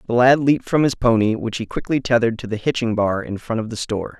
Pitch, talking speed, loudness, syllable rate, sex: 115 Hz, 270 wpm, -19 LUFS, 6.5 syllables/s, male